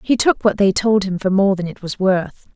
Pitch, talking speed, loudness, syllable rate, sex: 195 Hz, 280 wpm, -17 LUFS, 5.0 syllables/s, female